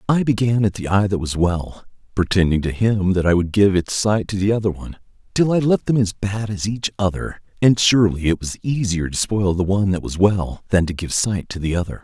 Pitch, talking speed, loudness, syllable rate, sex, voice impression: 100 Hz, 245 wpm, -19 LUFS, 5.5 syllables/s, male, very masculine, very middle-aged, very thick, slightly tensed, very powerful, dark, very soft, muffled, fluent, slightly raspy, very cool, very intellectual, sincere, very calm, very mature, friendly, very reassuring, very unique, very elegant, very wild, sweet, lively, very kind, modest